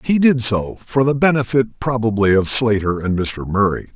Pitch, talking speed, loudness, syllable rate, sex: 115 Hz, 165 wpm, -17 LUFS, 4.8 syllables/s, male